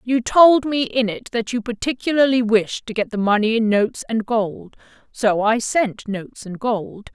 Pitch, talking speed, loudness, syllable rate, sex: 225 Hz, 195 wpm, -19 LUFS, 4.5 syllables/s, female